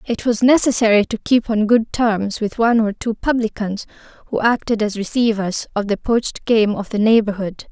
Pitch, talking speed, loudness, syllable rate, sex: 220 Hz, 185 wpm, -18 LUFS, 5.1 syllables/s, female